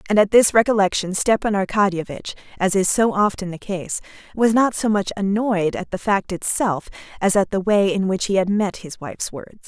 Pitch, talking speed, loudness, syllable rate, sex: 200 Hz, 205 wpm, -20 LUFS, 5.2 syllables/s, female